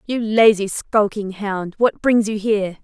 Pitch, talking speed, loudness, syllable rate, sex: 210 Hz, 170 wpm, -18 LUFS, 4.2 syllables/s, female